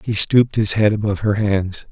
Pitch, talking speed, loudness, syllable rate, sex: 105 Hz, 220 wpm, -17 LUFS, 5.6 syllables/s, male